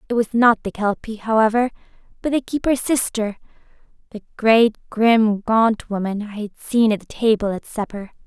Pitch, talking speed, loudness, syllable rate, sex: 220 Hz, 165 wpm, -19 LUFS, 4.9 syllables/s, female